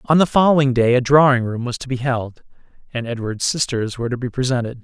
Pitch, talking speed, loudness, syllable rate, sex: 125 Hz, 225 wpm, -18 LUFS, 6.1 syllables/s, male